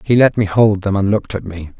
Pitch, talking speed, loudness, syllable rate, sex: 105 Hz, 300 wpm, -15 LUFS, 6.1 syllables/s, male